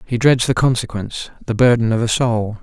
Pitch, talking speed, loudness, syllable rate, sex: 115 Hz, 185 wpm, -17 LUFS, 5.6 syllables/s, male